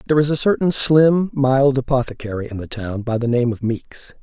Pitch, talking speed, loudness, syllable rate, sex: 130 Hz, 215 wpm, -18 LUFS, 5.3 syllables/s, male